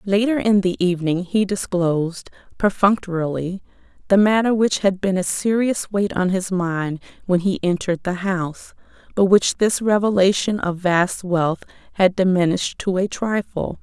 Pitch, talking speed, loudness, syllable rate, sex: 190 Hz, 150 wpm, -20 LUFS, 4.7 syllables/s, female